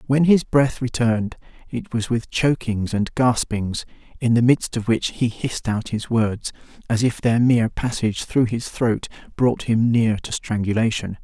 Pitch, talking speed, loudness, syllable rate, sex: 115 Hz, 175 wpm, -21 LUFS, 4.5 syllables/s, male